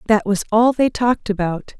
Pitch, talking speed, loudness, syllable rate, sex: 215 Hz, 200 wpm, -18 LUFS, 5.3 syllables/s, female